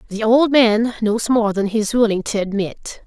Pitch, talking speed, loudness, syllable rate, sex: 220 Hz, 215 wpm, -17 LUFS, 4.7 syllables/s, female